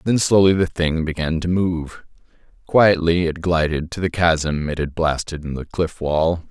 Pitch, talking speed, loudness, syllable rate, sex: 85 Hz, 185 wpm, -19 LUFS, 4.4 syllables/s, male